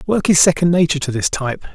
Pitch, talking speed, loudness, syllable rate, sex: 160 Hz, 240 wpm, -16 LUFS, 7.1 syllables/s, male